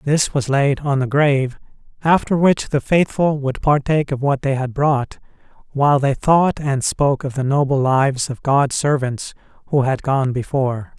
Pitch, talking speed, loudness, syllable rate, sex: 140 Hz, 180 wpm, -18 LUFS, 4.8 syllables/s, male